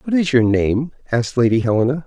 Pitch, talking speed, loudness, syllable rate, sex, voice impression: 130 Hz, 205 wpm, -17 LUFS, 6.2 syllables/s, male, very masculine, old, very thick, slightly relaxed, very powerful, dark, soft, muffled, fluent, cool, very intellectual, slightly refreshing, sincere, very calm, very mature, friendly, reassuring, unique, elegant, very wild, sweet, slightly lively, very kind, modest